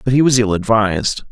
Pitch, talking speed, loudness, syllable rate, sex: 115 Hz, 230 wpm, -15 LUFS, 6.0 syllables/s, male